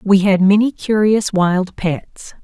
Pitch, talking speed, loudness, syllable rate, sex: 195 Hz, 150 wpm, -15 LUFS, 3.4 syllables/s, female